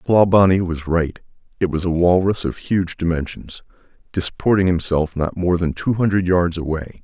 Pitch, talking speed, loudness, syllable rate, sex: 90 Hz, 160 wpm, -19 LUFS, 4.7 syllables/s, male